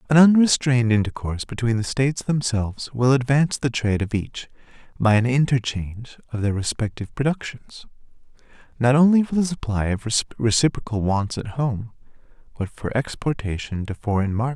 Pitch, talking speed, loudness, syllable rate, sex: 120 Hz, 150 wpm, -22 LUFS, 5.6 syllables/s, male